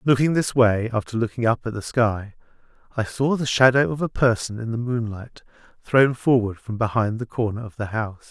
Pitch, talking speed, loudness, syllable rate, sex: 115 Hz, 200 wpm, -22 LUFS, 5.3 syllables/s, male